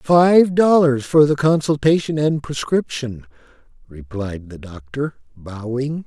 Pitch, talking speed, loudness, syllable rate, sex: 140 Hz, 110 wpm, -17 LUFS, 3.9 syllables/s, male